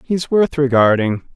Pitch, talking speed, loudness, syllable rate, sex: 140 Hz, 135 wpm, -16 LUFS, 4.1 syllables/s, male